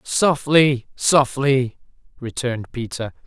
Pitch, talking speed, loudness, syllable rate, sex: 130 Hz, 55 wpm, -19 LUFS, 3.5 syllables/s, male